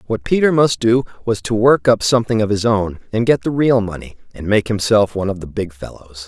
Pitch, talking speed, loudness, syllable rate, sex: 110 Hz, 240 wpm, -16 LUFS, 5.7 syllables/s, male